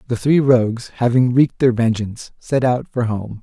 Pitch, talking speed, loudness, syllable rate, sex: 120 Hz, 195 wpm, -17 LUFS, 5.2 syllables/s, male